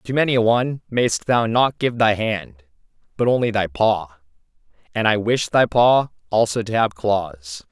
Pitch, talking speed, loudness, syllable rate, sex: 110 Hz, 180 wpm, -19 LUFS, 4.5 syllables/s, male